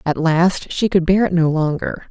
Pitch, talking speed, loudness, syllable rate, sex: 170 Hz, 230 wpm, -17 LUFS, 4.6 syllables/s, female